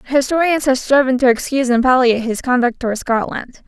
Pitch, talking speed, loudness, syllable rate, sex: 255 Hz, 180 wpm, -16 LUFS, 6.0 syllables/s, female